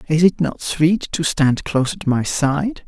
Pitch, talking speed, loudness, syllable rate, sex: 155 Hz, 210 wpm, -18 LUFS, 4.1 syllables/s, male